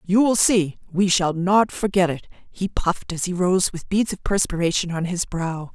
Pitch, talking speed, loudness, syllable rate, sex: 180 Hz, 210 wpm, -21 LUFS, 4.8 syllables/s, female